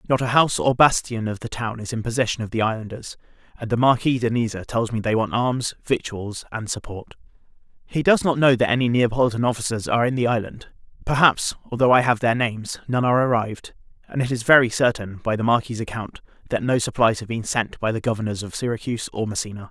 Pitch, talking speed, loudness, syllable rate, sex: 115 Hz, 215 wpm, -21 LUFS, 6.2 syllables/s, male